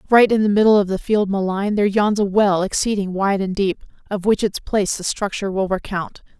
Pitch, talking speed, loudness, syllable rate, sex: 200 Hz, 225 wpm, -19 LUFS, 5.7 syllables/s, female